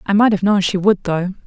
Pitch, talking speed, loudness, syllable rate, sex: 195 Hz, 285 wpm, -16 LUFS, 5.6 syllables/s, female